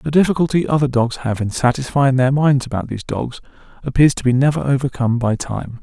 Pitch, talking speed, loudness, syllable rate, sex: 130 Hz, 195 wpm, -17 LUFS, 6.0 syllables/s, male